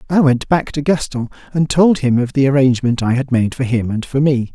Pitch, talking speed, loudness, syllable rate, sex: 135 Hz, 250 wpm, -16 LUFS, 5.6 syllables/s, male